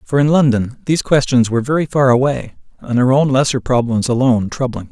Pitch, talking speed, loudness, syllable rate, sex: 130 Hz, 195 wpm, -15 LUFS, 6.0 syllables/s, male